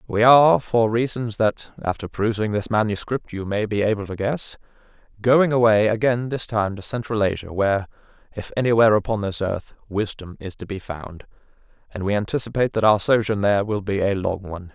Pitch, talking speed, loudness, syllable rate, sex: 105 Hz, 185 wpm, -21 LUFS, 5.6 syllables/s, male